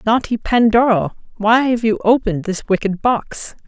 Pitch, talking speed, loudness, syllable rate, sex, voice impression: 220 Hz, 145 wpm, -16 LUFS, 4.8 syllables/s, female, gender-neutral, adult-like, refreshing, unique